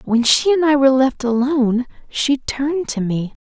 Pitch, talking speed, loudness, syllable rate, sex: 265 Hz, 195 wpm, -17 LUFS, 5.0 syllables/s, female